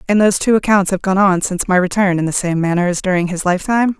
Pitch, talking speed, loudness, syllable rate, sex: 190 Hz, 270 wpm, -15 LUFS, 7.1 syllables/s, female